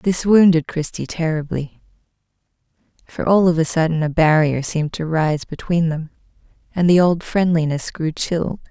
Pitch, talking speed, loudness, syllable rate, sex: 165 Hz, 150 wpm, -18 LUFS, 4.9 syllables/s, female